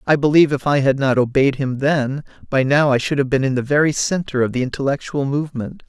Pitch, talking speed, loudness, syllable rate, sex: 140 Hz, 235 wpm, -18 LUFS, 6.0 syllables/s, male